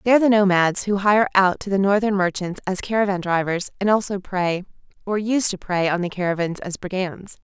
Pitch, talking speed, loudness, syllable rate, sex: 195 Hz, 200 wpm, -21 LUFS, 5.4 syllables/s, female